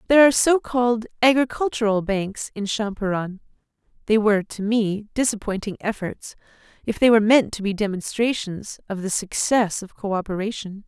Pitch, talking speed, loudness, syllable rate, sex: 215 Hz, 140 wpm, -22 LUFS, 5.4 syllables/s, female